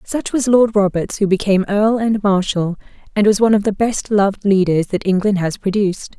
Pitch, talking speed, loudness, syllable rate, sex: 200 Hz, 205 wpm, -16 LUFS, 5.5 syllables/s, female